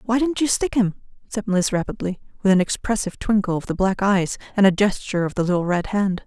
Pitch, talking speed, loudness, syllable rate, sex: 195 Hz, 230 wpm, -21 LUFS, 6.1 syllables/s, female